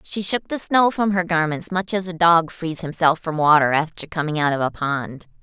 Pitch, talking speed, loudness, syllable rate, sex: 170 Hz, 230 wpm, -20 LUFS, 5.0 syllables/s, female